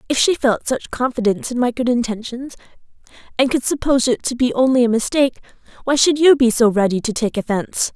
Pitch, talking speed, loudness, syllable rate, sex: 245 Hz, 205 wpm, -17 LUFS, 6.1 syllables/s, female